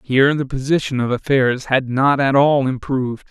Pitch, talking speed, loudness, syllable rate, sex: 135 Hz, 180 wpm, -17 LUFS, 5.0 syllables/s, male